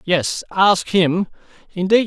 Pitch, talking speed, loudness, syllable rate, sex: 180 Hz, 115 wpm, -18 LUFS, 3.3 syllables/s, male